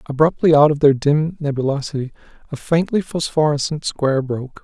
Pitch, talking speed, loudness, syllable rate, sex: 145 Hz, 140 wpm, -18 LUFS, 5.6 syllables/s, male